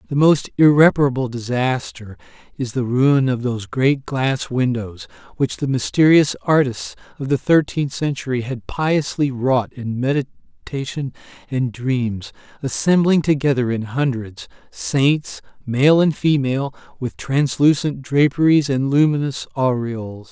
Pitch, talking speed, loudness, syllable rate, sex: 135 Hz, 120 wpm, -19 LUFS, 4.2 syllables/s, male